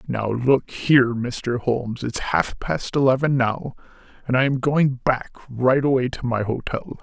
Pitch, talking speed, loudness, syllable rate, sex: 125 Hz, 170 wpm, -21 LUFS, 4.1 syllables/s, male